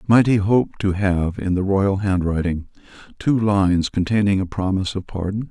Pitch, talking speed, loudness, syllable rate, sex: 100 Hz, 175 wpm, -20 LUFS, 4.9 syllables/s, male